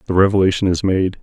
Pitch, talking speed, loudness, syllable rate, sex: 95 Hz, 195 wpm, -16 LUFS, 6.7 syllables/s, male